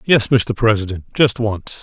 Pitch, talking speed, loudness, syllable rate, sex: 110 Hz, 165 wpm, -17 LUFS, 4.3 syllables/s, male